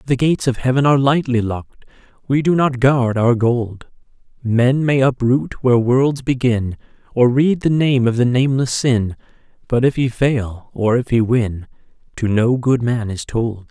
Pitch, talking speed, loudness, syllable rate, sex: 125 Hz, 180 wpm, -17 LUFS, 4.6 syllables/s, male